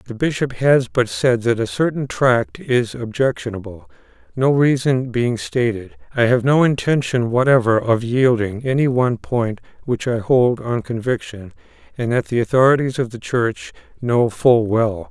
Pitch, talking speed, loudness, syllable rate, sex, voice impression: 120 Hz, 160 wpm, -18 LUFS, 4.5 syllables/s, male, masculine, adult-like, relaxed, weak, slightly dark, slightly muffled, halting, sincere, calm, friendly, wild, kind, modest